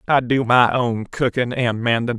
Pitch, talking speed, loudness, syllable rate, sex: 120 Hz, 190 wpm, -19 LUFS, 4.5 syllables/s, male